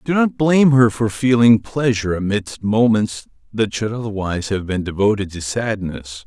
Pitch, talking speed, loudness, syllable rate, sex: 110 Hz, 165 wpm, -18 LUFS, 4.9 syllables/s, male